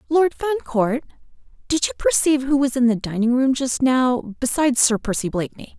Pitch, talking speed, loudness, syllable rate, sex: 255 Hz, 175 wpm, -20 LUFS, 6.3 syllables/s, female